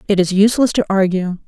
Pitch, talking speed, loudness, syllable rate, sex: 200 Hz, 205 wpm, -15 LUFS, 6.6 syllables/s, female